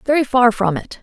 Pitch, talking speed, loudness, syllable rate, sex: 245 Hz, 235 wpm, -16 LUFS, 5.5 syllables/s, female